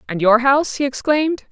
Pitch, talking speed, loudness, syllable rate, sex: 265 Hz, 200 wpm, -17 LUFS, 6.2 syllables/s, female